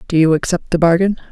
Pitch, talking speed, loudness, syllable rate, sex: 170 Hz, 230 wpm, -15 LUFS, 6.7 syllables/s, female